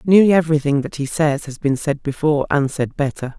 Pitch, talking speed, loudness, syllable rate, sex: 150 Hz, 215 wpm, -18 LUFS, 5.9 syllables/s, female